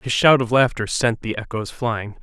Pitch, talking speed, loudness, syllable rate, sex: 115 Hz, 215 wpm, -20 LUFS, 4.6 syllables/s, male